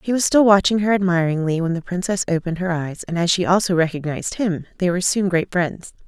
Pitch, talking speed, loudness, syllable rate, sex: 180 Hz, 225 wpm, -19 LUFS, 6.1 syllables/s, female